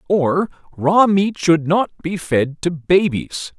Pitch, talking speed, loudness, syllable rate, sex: 170 Hz, 150 wpm, -18 LUFS, 3.3 syllables/s, male